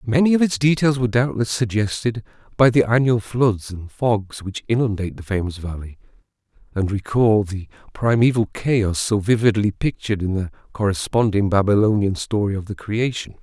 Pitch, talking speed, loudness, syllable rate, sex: 110 Hz, 150 wpm, -20 LUFS, 5.2 syllables/s, male